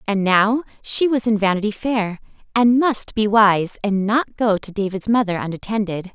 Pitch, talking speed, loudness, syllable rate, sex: 210 Hz, 175 wpm, -19 LUFS, 4.6 syllables/s, female